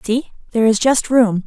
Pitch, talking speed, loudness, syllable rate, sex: 230 Hz, 205 wpm, -16 LUFS, 5.8 syllables/s, female